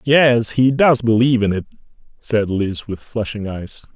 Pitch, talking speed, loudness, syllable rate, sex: 115 Hz, 165 wpm, -17 LUFS, 4.3 syllables/s, male